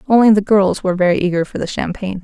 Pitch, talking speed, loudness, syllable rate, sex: 195 Hz, 240 wpm, -15 LUFS, 7.3 syllables/s, female